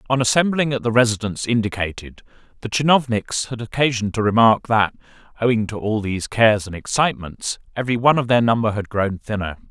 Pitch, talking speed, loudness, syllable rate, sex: 115 Hz, 175 wpm, -19 LUFS, 6.2 syllables/s, male